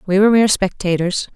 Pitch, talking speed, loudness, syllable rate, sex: 195 Hz, 180 wpm, -16 LUFS, 6.8 syllables/s, female